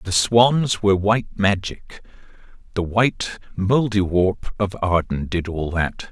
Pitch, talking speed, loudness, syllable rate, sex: 100 Hz, 120 wpm, -20 LUFS, 4.1 syllables/s, male